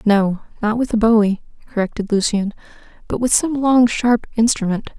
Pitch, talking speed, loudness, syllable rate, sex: 220 Hz, 155 wpm, -18 LUFS, 5.1 syllables/s, female